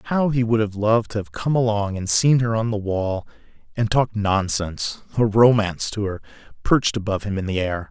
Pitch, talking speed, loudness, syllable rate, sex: 105 Hz, 210 wpm, -21 LUFS, 5.7 syllables/s, male